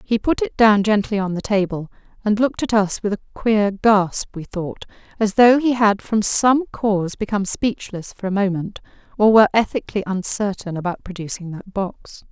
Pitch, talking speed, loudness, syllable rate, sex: 205 Hz, 185 wpm, -19 LUFS, 5.1 syllables/s, female